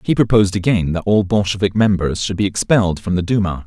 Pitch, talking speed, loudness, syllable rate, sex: 100 Hz, 215 wpm, -17 LUFS, 6.2 syllables/s, male